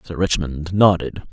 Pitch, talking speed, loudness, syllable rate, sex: 85 Hz, 135 wpm, -19 LUFS, 4.2 syllables/s, male